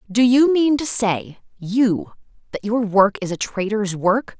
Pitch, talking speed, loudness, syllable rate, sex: 220 Hz, 175 wpm, -19 LUFS, 3.9 syllables/s, female